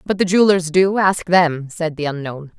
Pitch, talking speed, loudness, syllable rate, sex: 170 Hz, 210 wpm, -17 LUFS, 5.0 syllables/s, female